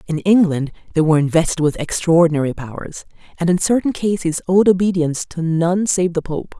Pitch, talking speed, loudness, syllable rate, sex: 170 Hz, 175 wpm, -17 LUFS, 5.7 syllables/s, female